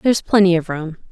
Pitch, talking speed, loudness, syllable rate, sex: 180 Hz, 215 wpm, -17 LUFS, 6.7 syllables/s, female